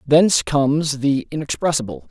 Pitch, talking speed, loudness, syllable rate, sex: 135 Hz, 115 wpm, -19 LUFS, 5.1 syllables/s, male